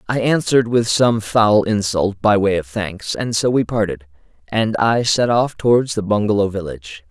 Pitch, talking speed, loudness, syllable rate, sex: 105 Hz, 185 wpm, -17 LUFS, 4.8 syllables/s, male